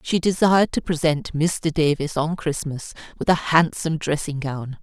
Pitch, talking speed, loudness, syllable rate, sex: 155 Hz, 160 wpm, -21 LUFS, 4.7 syllables/s, female